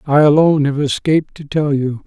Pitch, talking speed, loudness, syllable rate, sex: 145 Hz, 205 wpm, -15 LUFS, 5.7 syllables/s, male